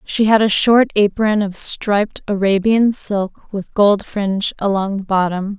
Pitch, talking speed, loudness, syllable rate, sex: 205 Hz, 160 wpm, -16 LUFS, 4.1 syllables/s, female